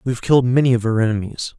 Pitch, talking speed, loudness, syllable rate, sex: 120 Hz, 265 wpm, -17 LUFS, 7.4 syllables/s, male